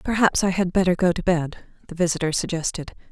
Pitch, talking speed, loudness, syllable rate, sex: 175 Hz, 190 wpm, -22 LUFS, 6.3 syllables/s, female